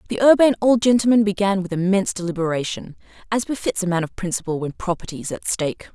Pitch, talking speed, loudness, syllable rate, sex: 200 Hz, 190 wpm, -20 LUFS, 6.8 syllables/s, female